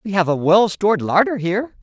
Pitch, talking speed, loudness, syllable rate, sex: 195 Hz, 230 wpm, -17 LUFS, 5.9 syllables/s, male